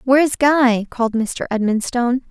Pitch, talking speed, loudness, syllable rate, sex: 245 Hz, 130 wpm, -17 LUFS, 4.9 syllables/s, female